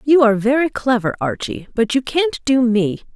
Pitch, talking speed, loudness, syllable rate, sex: 245 Hz, 190 wpm, -17 LUFS, 5.0 syllables/s, female